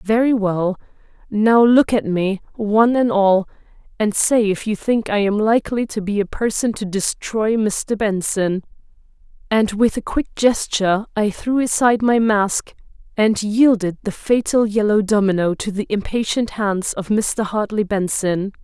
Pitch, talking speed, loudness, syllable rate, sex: 210 Hz, 160 wpm, -18 LUFS, 4.4 syllables/s, female